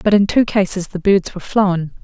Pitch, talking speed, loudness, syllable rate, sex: 190 Hz, 235 wpm, -16 LUFS, 5.4 syllables/s, female